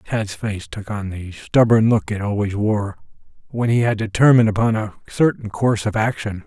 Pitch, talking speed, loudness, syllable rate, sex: 105 Hz, 185 wpm, -19 LUFS, 5.1 syllables/s, male